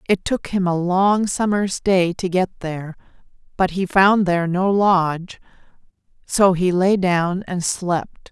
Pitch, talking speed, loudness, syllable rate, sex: 185 Hz, 160 wpm, -19 LUFS, 3.9 syllables/s, female